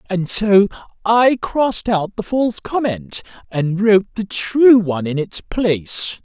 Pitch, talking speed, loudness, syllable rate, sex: 200 Hz, 155 wpm, -17 LUFS, 4.1 syllables/s, male